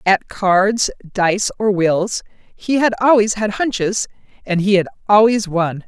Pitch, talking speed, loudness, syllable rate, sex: 200 Hz, 155 wpm, -16 LUFS, 3.8 syllables/s, female